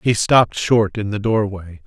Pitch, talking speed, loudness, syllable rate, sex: 105 Hz, 195 wpm, -17 LUFS, 4.4 syllables/s, male